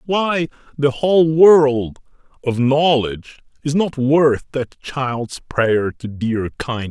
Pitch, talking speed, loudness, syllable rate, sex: 135 Hz, 140 wpm, -17 LUFS, 3.5 syllables/s, male